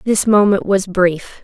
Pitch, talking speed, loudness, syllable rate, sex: 195 Hz, 165 wpm, -14 LUFS, 3.8 syllables/s, female